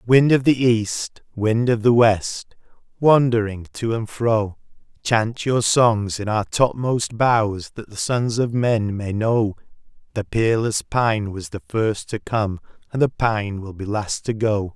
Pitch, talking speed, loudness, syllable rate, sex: 110 Hz, 170 wpm, -20 LUFS, 3.7 syllables/s, male